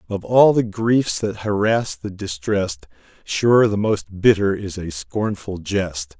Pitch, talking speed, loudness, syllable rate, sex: 105 Hz, 155 wpm, -20 LUFS, 3.6 syllables/s, male